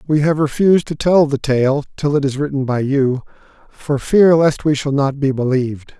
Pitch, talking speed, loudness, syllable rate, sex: 140 Hz, 210 wpm, -16 LUFS, 5.0 syllables/s, male